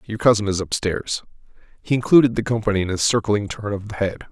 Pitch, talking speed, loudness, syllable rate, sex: 105 Hz, 210 wpm, -20 LUFS, 6.2 syllables/s, male